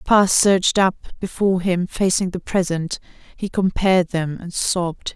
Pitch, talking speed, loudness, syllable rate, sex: 185 Hz, 165 wpm, -19 LUFS, 5.0 syllables/s, female